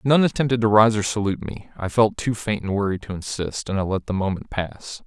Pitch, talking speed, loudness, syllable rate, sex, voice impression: 105 Hz, 250 wpm, -22 LUFS, 5.8 syllables/s, male, masculine, adult-like, tensed, powerful, clear, fluent, cool, intellectual, calm, friendly, wild, slightly lively, slightly strict, slightly modest